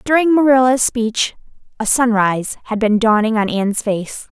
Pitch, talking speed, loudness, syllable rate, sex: 230 Hz, 150 wpm, -16 LUFS, 4.9 syllables/s, female